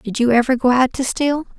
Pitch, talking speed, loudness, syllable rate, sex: 255 Hz, 265 wpm, -17 LUFS, 5.5 syllables/s, female